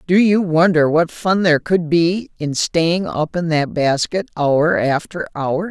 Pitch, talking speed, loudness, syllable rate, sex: 165 Hz, 180 wpm, -17 LUFS, 4.0 syllables/s, female